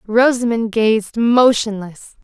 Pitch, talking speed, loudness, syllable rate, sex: 225 Hz, 80 wpm, -15 LUFS, 3.4 syllables/s, female